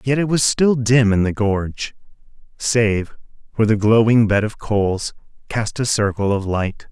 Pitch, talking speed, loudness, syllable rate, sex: 110 Hz, 175 wpm, -18 LUFS, 4.6 syllables/s, male